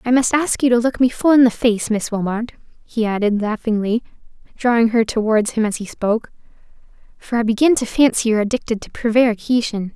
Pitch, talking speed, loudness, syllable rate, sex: 230 Hz, 195 wpm, -18 LUFS, 5.9 syllables/s, female